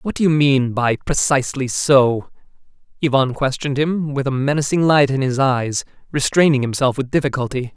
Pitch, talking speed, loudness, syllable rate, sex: 135 Hz, 160 wpm, -18 LUFS, 5.3 syllables/s, male